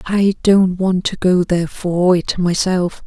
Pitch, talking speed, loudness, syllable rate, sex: 180 Hz, 175 wpm, -16 LUFS, 4.0 syllables/s, female